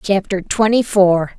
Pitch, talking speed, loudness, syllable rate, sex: 195 Hz, 130 wpm, -15 LUFS, 4.0 syllables/s, female